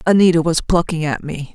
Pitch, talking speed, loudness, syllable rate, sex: 165 Hz, 195 wpm, -17 LUFS, 5.6 syllables/s, female